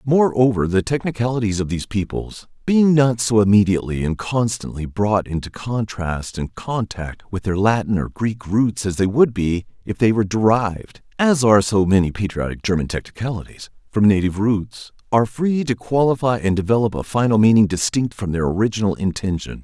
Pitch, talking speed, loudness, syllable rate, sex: 105 Hz, 170 wpm, -19 LUFS, 4.7 syllables/s, male